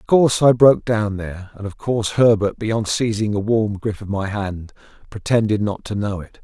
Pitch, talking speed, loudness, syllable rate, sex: 105 Hz, 215 wpm, -19 LUFS, 5.2 syllables/s, male